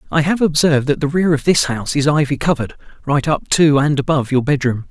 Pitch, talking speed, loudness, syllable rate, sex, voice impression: 145 Hz, 235 wpm, -16 LUFS, 6.4 syllables/s, male, masculine, slightly adult-like, tensed, bright, clear, fluent, cool, intellectual, refreshing, sincere, friendly, reassuring, lively, kind